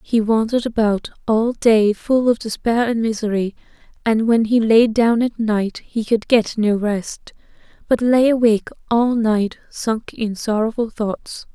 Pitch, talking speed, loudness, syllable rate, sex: 225 Hz, 160 wpm, -18 LUFS, 4.2 syllables/s, female